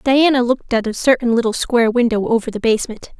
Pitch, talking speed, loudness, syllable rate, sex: 235 Hz, 205 wpm, -16 LUFS, 6.5 syllables/s, female